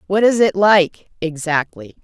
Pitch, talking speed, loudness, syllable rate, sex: 180 Hz, 120 wpm, -16 LUFS, 4.2 syllables/s, female